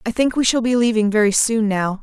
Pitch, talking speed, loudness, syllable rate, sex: 220 Hz, 265 wpm, -17 LUFS, 5.8 syllables/s, female